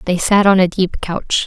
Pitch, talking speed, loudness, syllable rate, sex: 185 Hz, 245 wpm, -15 LUFS, 4.5 syllables/s, female